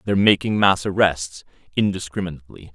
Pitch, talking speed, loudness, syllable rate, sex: 95 Hz, 110 wpm, -20 LUFS, 6.1 syllables/s, male